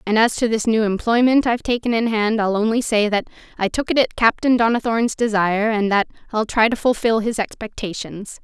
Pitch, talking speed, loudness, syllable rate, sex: 220 Hz, 205 wpm, -19 LUFS, 5.7 syllables/s, female